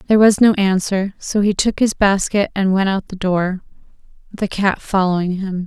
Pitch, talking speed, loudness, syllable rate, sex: 195 Hz, 190 wpm, -17 LUFS, 4.8 syllables/s, female